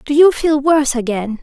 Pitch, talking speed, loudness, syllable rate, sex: 275 Hz, 210 wpm, -14 LUFS, 5.3 syllables/s, female